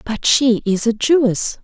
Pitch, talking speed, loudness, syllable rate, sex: 235 Hz, 185 wpm, -16 LUFS, 4.1 syllables/s, female